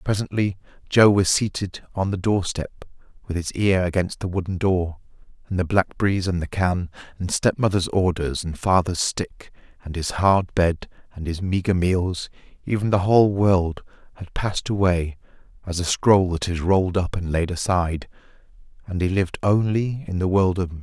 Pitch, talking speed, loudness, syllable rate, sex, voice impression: 95 Hz, 175 wpm, -22 LUFS, 5.0 syllables/s, male, masculine, adult-like, tensed, powerful, slightly muffled, slightly raspy, intellectual, calm, slightly mature, slightly reassuring, wild, slightly strict